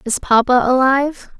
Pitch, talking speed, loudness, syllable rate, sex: 260 Hz, 130 wpm, -15 LUFS, 5.0 syllables/s, female